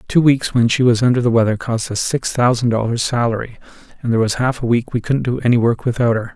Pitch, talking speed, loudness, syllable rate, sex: 120 Hz, 255 wpm, -17 LUFS, 6.3 syllables/s, male